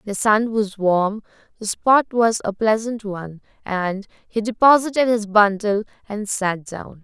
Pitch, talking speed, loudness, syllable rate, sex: 210 Hz, 155 wpm, -19 LUFS, 4.1 syllables/s, female